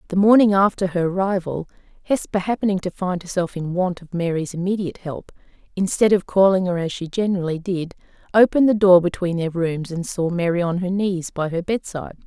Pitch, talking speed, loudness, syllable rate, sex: 180 Hz, 190 wpm, -20 LUFS, 5.8 syllables/s, female